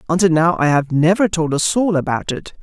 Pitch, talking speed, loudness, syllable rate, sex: 165 Hz, 230 wpm, -16 LUFS, 5.6 syllables/s, male